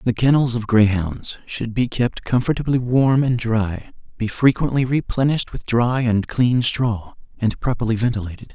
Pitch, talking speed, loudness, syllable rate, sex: 120 Hz, 155 wpm, -20 LUFS, 4.7 syllables/s, male